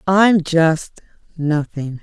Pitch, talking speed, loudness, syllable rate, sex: 165 Hz, 90 wpm, -17 LUFS, 2.8 syllables/s, female